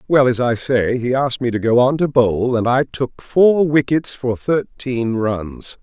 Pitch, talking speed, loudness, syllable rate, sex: 125 Hz, 205 wpm, -17 LUFS, 4.1 syllables/s, male